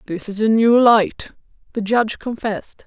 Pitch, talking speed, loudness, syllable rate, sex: 220 Hz, 170 wpm, -17 LUFS, 4.8 syllables/s, female